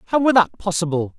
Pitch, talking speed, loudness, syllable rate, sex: 175 Hz, 200 wpm, -19 LUFS, 8.1 syllables/s, male